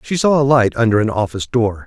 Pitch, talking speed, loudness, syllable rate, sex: 120 Hz, 255 wpm, -16 LUFS, 6.2 syllables/s, male